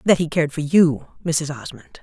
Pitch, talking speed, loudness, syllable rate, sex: 155 Hz, 210 wpm, -20 LUFS, 5.2 syllables/s, female